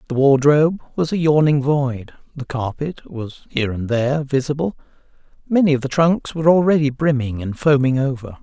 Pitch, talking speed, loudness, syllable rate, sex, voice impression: 140 Hz, 165 wpm, -18 LUFS, 5.4 syllables/s, male, masculine, very middle-aged, thick, slightly tensed, slightly powerful, bright, soft, clear, fluent, slightly raspy, cool, slightly intellectual, refreshing, slightly sincere, calm, mature, very friendly, reassuring, unique, slightly elegant, wild, slightly sweet, very lively, kind, intense, slightly sharp, light